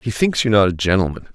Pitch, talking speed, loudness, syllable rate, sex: 105 Hz, 265 wpm, -17 LUFS, 7.5 syllables/s, male